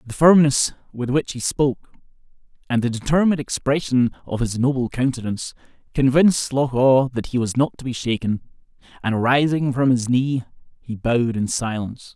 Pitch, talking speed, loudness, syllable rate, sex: 125 Hz, 165 wpm, -20 LUFS, 5.3 syllables/s, male